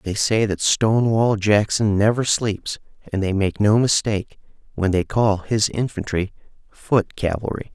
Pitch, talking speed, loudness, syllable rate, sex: 105 Hz, 145 wpm, -20 LUFS, 4.4 syllables/s, male